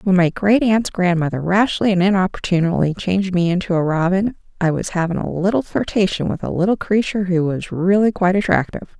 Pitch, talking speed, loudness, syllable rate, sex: 185 Hz, 185 wpm, -18 LUFS, 6.0 syllables/s, female